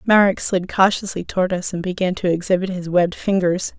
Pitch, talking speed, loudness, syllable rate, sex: 185 Hz, 190 wpm, -19 LUFS, 5.8 syllables/s, female